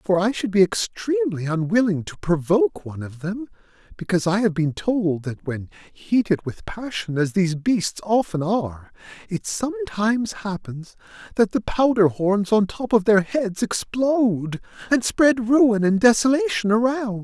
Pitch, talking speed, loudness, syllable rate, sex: 200 Hz, 155 wpm, -21 LUFS, 4.6 syllables/s, male